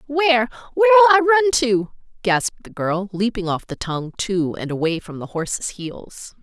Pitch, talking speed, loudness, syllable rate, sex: 230 Hz, 180 wpm, -19 LUFS, 5.2 syllables/s, female